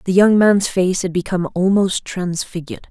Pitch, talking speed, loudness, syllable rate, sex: 185 Hz, 165 wpm, -17 LUFS, 5.2 syllables/s, female